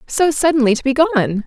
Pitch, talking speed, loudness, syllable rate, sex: 270 Hz, 205 wpm, -15 LUFS, 5.3 syllables/s, female